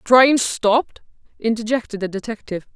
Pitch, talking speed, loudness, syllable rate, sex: 225 Hz, 130 wpm, -19 LUFS, 5.9 syllables/s, female